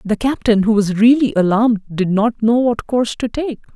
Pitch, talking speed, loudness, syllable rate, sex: 225 Hz, 210 wpm, -16 LUFS, 5.3 syllables/s, female